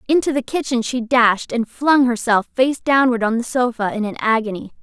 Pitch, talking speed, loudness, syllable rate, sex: 240 Hz, 200 wpm, -18 LUFS, 5.2 syllables/s, female